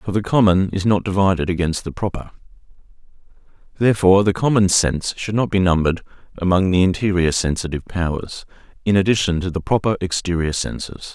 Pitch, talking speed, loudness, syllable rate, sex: 95 Hz, 155 wpm, -19 LUFS, 6.1 syllables/s, male